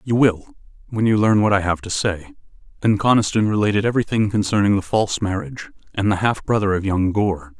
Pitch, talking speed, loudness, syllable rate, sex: 100 Hz, 195 wpm, -19 LUFS, 6.1 syllables/s, male